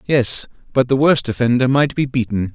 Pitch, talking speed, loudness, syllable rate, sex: 125 Hz, 190 wpm, -17 LUFS, 5.2 syllables/s, male